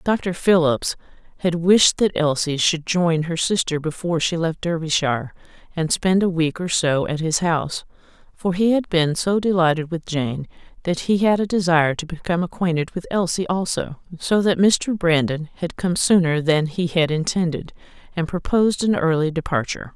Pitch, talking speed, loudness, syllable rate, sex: 170 Hz, 175 wpm, -20 LUFS, 5.0 syllables/s, female